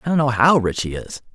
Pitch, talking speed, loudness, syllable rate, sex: 125 Hz, 315 wpm, -18 LUFS, 6.1 syllables/s, male